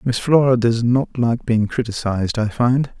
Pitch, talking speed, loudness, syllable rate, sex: 120 Hz, 180 wpm, -18 LUFS, 4.5 syllables/s, male